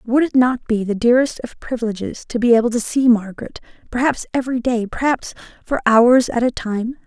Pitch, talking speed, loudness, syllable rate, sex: 240 Hz, 195 wpm, -18 LUFS, 5.8 syllables/s, female